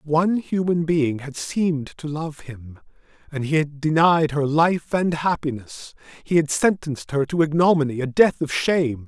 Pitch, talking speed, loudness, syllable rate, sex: 155 Hz, 170 wpm, -21 LUFS, 4.7 syllables/s, male